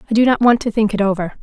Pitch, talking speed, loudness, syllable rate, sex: 215 Hz, 335 wpm, -16 LUFS, 8.2 syllables/s, female